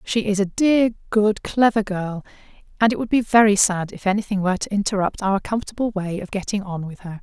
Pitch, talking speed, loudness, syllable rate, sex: 205 Hz, 215 wpm, -21 LUFS, 5.8 syllables/s, female